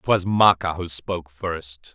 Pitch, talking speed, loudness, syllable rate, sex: 85 Hz, 155 wpm, -22 LUFS, 3.8 syllables/s, male